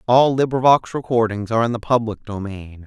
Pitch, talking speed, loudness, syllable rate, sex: 115 Hz, 170 wpm, -19 LUFS, 5.5 syllables/s, male